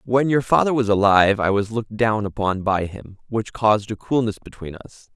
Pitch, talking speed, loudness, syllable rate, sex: 105 Hz, 210 wpm, -20 LUFS, 5.4 syllables/s, male